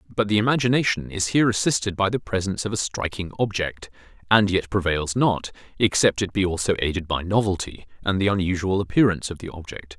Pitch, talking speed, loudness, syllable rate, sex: 95 Hz, 185 wpm, -22 LUFS, 6.2 syllables/s, male